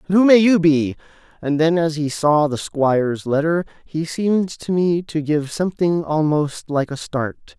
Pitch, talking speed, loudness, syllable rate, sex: 160 Hz, 190 wpm, -19 LUFS, 4.4 syllables/s, male